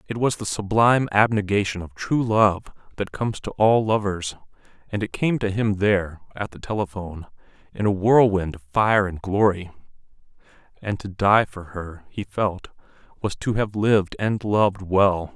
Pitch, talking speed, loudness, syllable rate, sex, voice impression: 100 Hz, 170 wpm, -22 LUFS, 4.8 syllables/s, male, masculine, slightly middle-aged, slightly tensed, hard, clear, fluent, intellectual, calm, friendly, reassuring, slightly wild, kind, modest